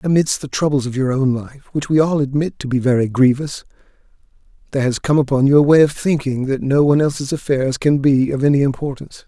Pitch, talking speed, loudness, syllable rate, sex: 140 Hz, 220 wpm, -17 LUFS, 6.1 syllables/s, male